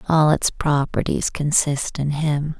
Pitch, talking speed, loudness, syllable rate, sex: 150 Hz, 140 wpm, -20 LUFS, 3.7 syllables/s, female